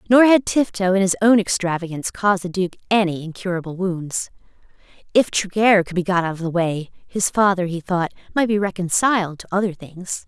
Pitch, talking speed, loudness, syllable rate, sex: 190 Hz, 185 wpm, -20 LUFS, 5.6 syllables/s, female